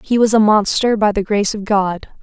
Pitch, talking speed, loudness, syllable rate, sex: 210 Hz, 245 wpm, -15 LUFS, 5.5 syllables/s, female